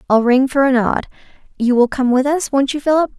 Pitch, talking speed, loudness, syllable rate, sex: 265 Hz, 225 wpm, -15 LUFS, 6.1 syllables/s, female